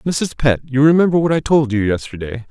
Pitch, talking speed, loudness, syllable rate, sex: 135 Hz, 215 wpm, -16 LUFS, 5.5 syllables/s, male